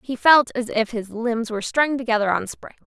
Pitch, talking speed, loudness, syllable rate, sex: 235 Hz, 230 wpm, -20 LUFS, 5.3 syllables/s, female